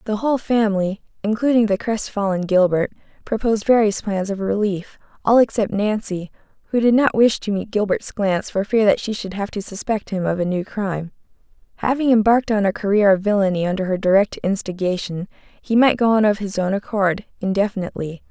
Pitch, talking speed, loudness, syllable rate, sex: 205 Hz, 185 wpm, -19 LUFS, 5.8 syllables/s, female